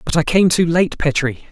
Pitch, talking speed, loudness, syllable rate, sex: 160 Hz, 240 wpm, -16 LUFS, 5.1 syllables/s, male